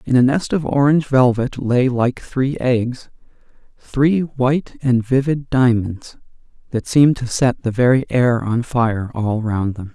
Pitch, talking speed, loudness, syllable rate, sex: 125 Hz, 165 wpm, -17 LUFS, 4.1 syllables/s, male